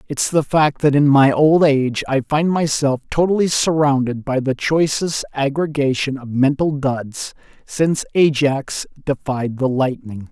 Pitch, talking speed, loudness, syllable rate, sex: 140 Hz, 145 wpm, -17 LUFS, 4.3 syllables/s, male